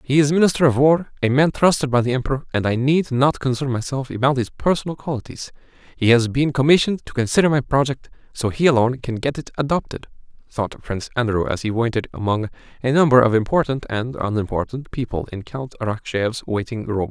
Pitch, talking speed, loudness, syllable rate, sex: 125 Hz, 195 wpm, -20 LUFS, 6.0 syllables/s, male